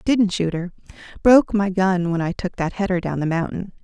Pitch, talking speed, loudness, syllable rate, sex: 185 Hz, 220 wpm, -20 LUFS, 5.4 syllables/s, female